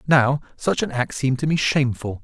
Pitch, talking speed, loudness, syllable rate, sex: 135 Hz, 215 wpm, -21 LUFS, 5.7 syllables/s, male